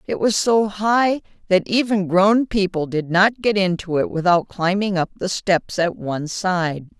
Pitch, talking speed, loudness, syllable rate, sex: 190 Hz, 180 wpm, -19 LUFS, 4.3 syllables/s, female